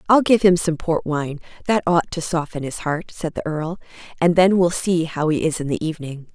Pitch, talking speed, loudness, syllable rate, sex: 165 Hz, 235 wpm, -20 LUFS, 5.2 syllables/s, female